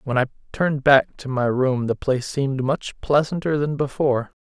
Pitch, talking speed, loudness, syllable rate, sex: 135 Hz, 190 wpm, -21 LUFS, 5.4 syllables/s, male